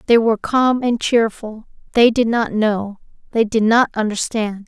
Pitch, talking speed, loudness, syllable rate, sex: 225 Hz, 165 wpm, -17 LUFS, 4.4 syllables/s, female